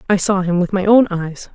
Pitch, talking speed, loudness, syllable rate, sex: 190 Hz, 270 wpm, -15 LUFS, 5.3 syllables/s, female